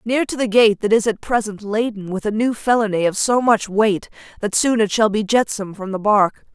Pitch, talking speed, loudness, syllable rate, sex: 215 Hz, 240 wpm, -18 LUFS, 5.1 syllables/s, female